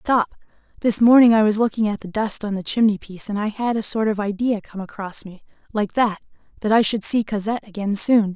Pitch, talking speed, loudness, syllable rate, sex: 210 Hz, 230 wpm, -20 LUFS, 5.8 syllables/s, female